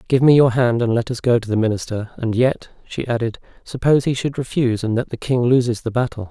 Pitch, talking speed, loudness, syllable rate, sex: 120 Hz, 245 wpm, -19 LUFS, 6.2 syllables/s, male